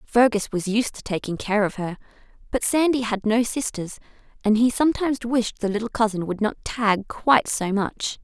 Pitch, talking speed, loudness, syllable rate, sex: 220 Hz, 190 wpm, -23 LUFS, 5.2 syllables/s, female